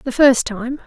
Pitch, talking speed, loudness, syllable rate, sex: 250 Hz, 210 wpm, -16 LUFS, 4.3 syllables/s, female